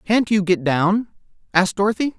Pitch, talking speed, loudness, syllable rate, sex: 195 Hz, 165 wpm, -19 LUFS, 5.3 syllables/s, male